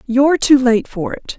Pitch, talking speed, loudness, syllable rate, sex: 250 Hz, 215 wpm, -14 LUFS, 4.8 syllables/s, female